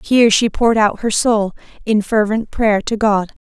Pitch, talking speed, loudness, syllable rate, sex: 215 Hz, 190 wpm, -16 LUFS, 4.8 syllables/s, female